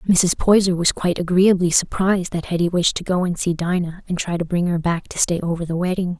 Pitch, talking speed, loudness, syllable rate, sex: 175 Hz, 240 wpm, -19 LUFS, 5.9 syllables/s, female